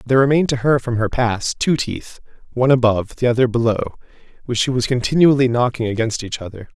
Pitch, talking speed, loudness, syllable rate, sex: 120 Hz, 175 wpm, -18 LUFS, 6.3 syllables/s, male